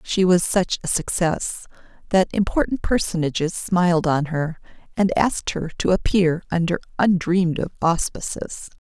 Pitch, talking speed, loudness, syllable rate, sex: 175 Hz, 135 wpm, -21 LUFS, 4.7 syllables/s, female